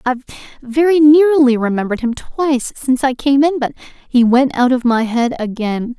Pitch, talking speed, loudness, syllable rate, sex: 260 Hz, 180 wpm, -14 LUFS, 5.3 syllables/s, female